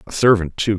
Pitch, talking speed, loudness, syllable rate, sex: 100 Hz, 230 wpm, -17 LUFS, 6.7 syllables/s, male